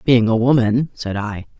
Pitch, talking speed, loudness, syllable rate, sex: 115 Hz, 190 wpm, -18 LUFS, 4.4 syllables/s, female